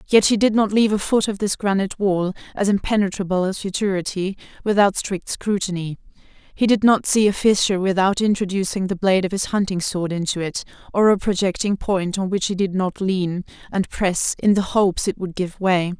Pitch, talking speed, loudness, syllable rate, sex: 195 Hz, 200 wpm, -20 LUFS, 5.5 syllables/s, female